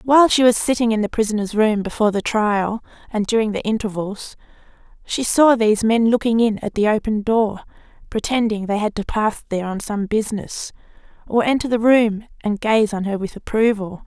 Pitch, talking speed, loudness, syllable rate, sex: 220 Hz, 190 wpm, -19 LUFS, 5.4 syllables/s, female